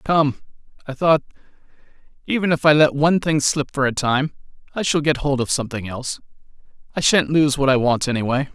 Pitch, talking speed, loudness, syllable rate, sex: 140 Hz, 175 wpm, -19 LUFS, 5.9 syllables/s, male